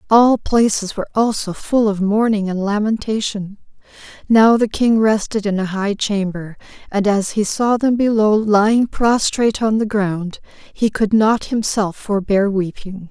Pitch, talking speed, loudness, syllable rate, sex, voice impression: 210 Hz, 155 wpm, -17 LUFS, 4.3 syllables/s, female, feminine, adult-like, tensed, slightly soft, clear, slightly raspy, intellectual, calm, reassuring, elegant, kind, modest